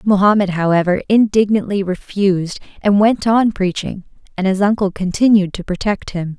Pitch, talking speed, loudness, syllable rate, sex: 195 Hz, 140 wpm, -16 LUFS, 5.1 syllables/s, female